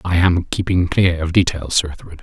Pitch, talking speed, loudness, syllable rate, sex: 85 Hz, 215 wpm, -17 LUFS, 5.7 syllables/s, male